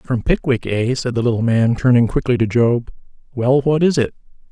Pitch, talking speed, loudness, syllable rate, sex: 125 Hz, 200 wpm, -17 LUFS, 5.1 syllables/s, male